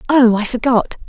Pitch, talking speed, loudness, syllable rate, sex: 240 Hz, 165 wpm, -15 LUFS, 5.1 syllables/s, female